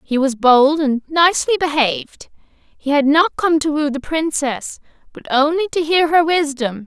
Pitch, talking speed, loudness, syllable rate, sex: 300 Hz, 175 wpm, -16 LUFS, 4.3 syllables/s, female